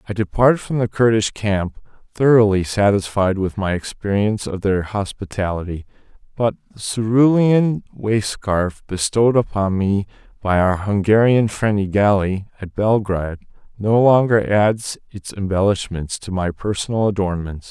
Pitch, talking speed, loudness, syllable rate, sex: 105 Hz, 130 wpm, -18 LUFS, 4.6 syllables/s, male